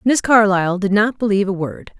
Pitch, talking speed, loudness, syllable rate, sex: 205 Hz, 210 wpm, -16 LUFS, 5.9 syllables/s, female